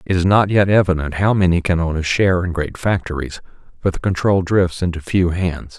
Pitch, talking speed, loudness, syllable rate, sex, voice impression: 90 Hz, 220 wpm, -17 LUFS, 5.5 syllables/s, male, masculine, adult-like, hard, clear, fluent, cool, intellectual, calm, reassuring, elegant, slightly wild, kind